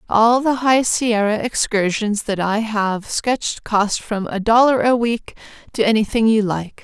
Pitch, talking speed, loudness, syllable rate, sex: 220 Hz, 165 wpm, -18 LUFS, 4.2 syllables/s, female